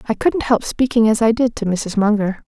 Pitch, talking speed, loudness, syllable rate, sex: 220 Hz, 245 wpm, -17 LUFS, 5.2 syllables/s, female